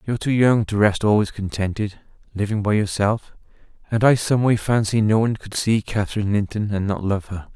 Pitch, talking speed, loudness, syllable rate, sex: 105 Hz, 200 wpm, -20 LUFS, 5.7 syllables/s, male